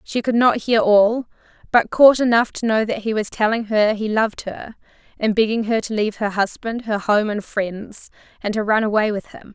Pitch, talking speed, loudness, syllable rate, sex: 220 Hz, 220 wpm, -19 LUFS, 5.0 syllables/s, female